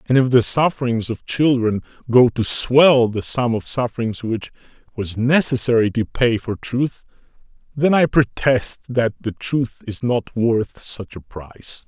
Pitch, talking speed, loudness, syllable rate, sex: 120 Hz, 160 wpm, -19 LUFS, 4.2 syllables/s, male